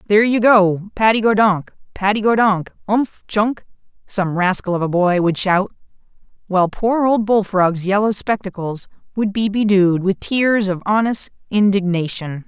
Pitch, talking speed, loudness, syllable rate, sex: 200 Hz, 150 wpm, -17 LUFS, 4.7 syllables/s, female